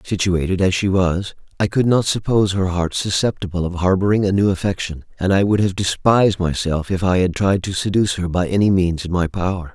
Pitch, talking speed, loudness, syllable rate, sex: 95 Hz, 215 wpm, -18 LUFS, 5.7 syllables/s, male